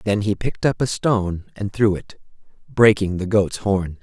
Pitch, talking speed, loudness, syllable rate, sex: 105 Hz, 195 wpm, -20 LUFS, 4.7 syllables/s, male